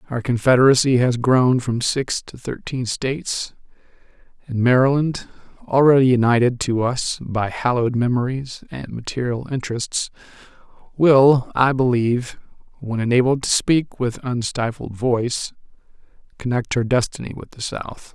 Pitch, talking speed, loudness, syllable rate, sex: 125 Hz, 120 wpm, -19 LUFS, 4.7 syllables/s, male